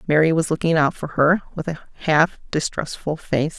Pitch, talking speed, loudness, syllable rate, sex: 155 Hz, 185 wpm, -21 LUFS, 5.2 syllables/s, female